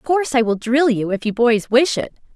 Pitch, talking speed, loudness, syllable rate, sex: 250 Hz, 280 wpm, -17 LUFS, 5.7 syllables/s, female